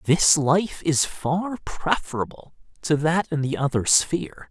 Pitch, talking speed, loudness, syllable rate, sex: 155 Hz, 145 wpm, -22 LUFS, 4.0 syllables/s, male